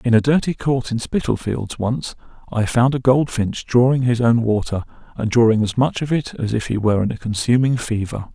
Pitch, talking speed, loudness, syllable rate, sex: 120 Hz, 210 wpm, -19 LUFS, 5.3 syllables/s, male